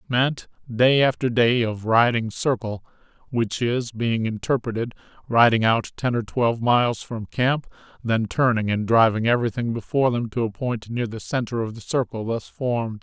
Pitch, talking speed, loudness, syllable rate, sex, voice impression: 115 Hz, 170 wpm, -22 LUFS, 4.9 syllables/s, male, very masculine, middle-aged, slightly thick, muffled, cool, slightly wild